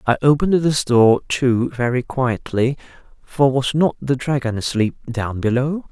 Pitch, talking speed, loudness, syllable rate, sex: 130 Hz, 150 wpm, -18 LUFS, 4.3 syllables/s, male